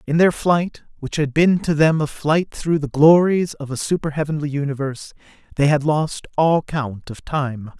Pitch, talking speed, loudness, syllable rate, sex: 150 Hz, 190 wpm, -19 LUFS, 4.6 syllables/s, male